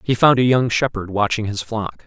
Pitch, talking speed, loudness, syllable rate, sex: 110 Hz, 235 wpm, -18 LUFS, 5.1 syllables/s, male